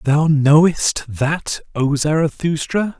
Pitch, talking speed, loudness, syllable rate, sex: 150 Hz, 100 wpm, -17 LUFS, 3.3 syllables/s, male